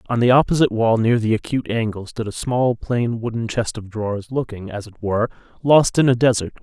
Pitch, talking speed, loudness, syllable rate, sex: 115 Hz, 215 wpm, -19 LUFS, 5.8 syllables/s, male